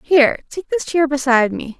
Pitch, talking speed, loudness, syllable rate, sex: 285 Hz, 200 wpm, -17 LUFS, 6.0 syllables/s, female